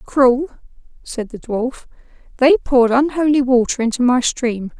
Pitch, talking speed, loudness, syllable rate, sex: 255 Hz, 140 wpm, -16 LUFS, 4.4 syllables/s, female